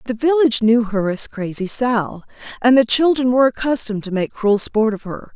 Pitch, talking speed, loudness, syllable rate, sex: 230 Hz, 200 wpm, -17 LUFS, 5.4 syllables/s, female